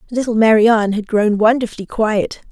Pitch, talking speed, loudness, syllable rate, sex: 220 Hz, 145 wpm, -15 LUFS, 5.4 syllables/s, female